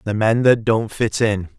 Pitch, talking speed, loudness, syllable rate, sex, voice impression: 110 Hz, 230 wpm, -18 LUFS, 4.3 syllables/s, male, masculine, middle-aged, slightly powerful, raspy, mature, friendly, wild, lively, slightly intense, slightly light